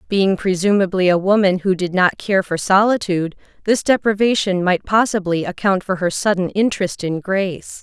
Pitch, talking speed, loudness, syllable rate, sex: 190 Hz, 160 wpm, -17 LUFS, 5.2 syllables/s, female